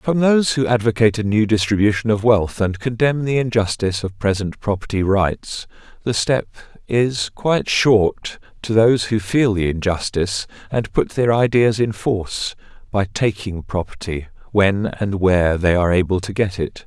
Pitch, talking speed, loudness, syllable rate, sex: 105 Hz, 165 wpm, -18 LUFS, 4.9 syllables/s, male